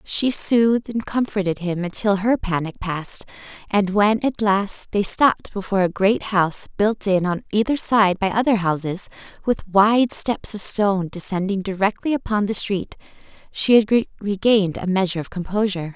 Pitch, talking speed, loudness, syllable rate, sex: 200 Hz, 165 wpm, -20 LUFS, 4.9 syllables/s, female